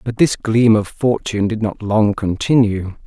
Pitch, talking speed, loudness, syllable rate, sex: 110 Hz, 175 wpm, -17 LUFS, 4.5 syllables/s, male